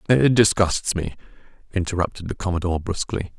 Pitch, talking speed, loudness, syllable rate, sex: 95 Hz, 125 wpm, -22 LUFS, 6.2 syllables/s, male